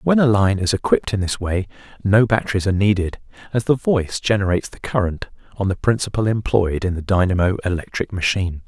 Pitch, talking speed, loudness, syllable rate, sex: 100 Hz, 185 wpm, -19 LUFS, 6.2 syllables/s, male